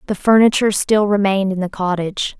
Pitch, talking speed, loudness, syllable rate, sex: 200 Hz, 175 wpm, -16 LUFS, 6.4 syllables/s, female